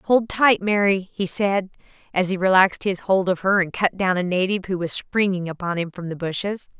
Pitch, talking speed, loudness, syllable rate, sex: 190 Hz, 220 wpm, -21 LUFS, 5.3 syllables/s, female